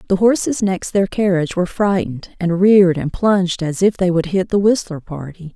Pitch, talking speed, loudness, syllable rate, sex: 185 Hz, 205 wpm, -16 LUFS, 5.5 syllables/s, female